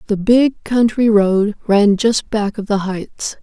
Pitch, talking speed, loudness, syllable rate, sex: 210 Hz, 175 wpm, -15 LUFS, 3.6 syllables/s, female